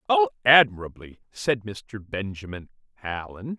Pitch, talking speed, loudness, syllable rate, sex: 115 Hz, 100 wpm, -23 LUFS, 4.3 syllables/s, male